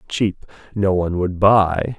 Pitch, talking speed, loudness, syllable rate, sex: 95 Hz, 150 wpm, -18 LUFS, 4.1 syllables/s, male